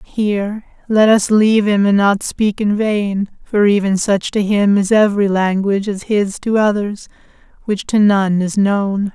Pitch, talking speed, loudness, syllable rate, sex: 205 Hz, 175 wpm, -15 LUFS, 4.3 syllables/s, female